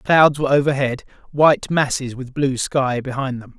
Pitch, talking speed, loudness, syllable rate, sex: 135 Hz, 165 wpm, -19 LUFS, 4.9 syllables/s, male